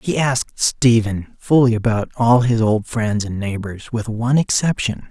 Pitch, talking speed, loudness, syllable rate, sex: 115 Hz, 165 wpm, -18 LUFS, 4.5 syllables/s, male